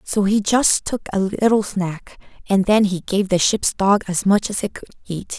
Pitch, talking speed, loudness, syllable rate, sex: 200 Hz, 225 wpm, -19 LUFS, 4.4 syllables/s, female